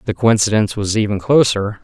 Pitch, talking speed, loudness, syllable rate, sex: 105 Hz, 165 wpm, -15 LUFS, 6.0 syllables/s, male